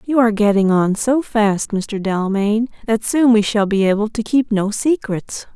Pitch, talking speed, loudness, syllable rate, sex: 215 Hz, 195 wpm, -17 LUFS, 4.4 syllables/s, female